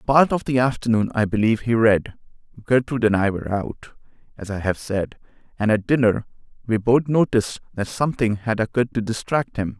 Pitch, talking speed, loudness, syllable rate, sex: 115 Hz, 180 wpm, -21 LUFS, 5.7 syllables/s, male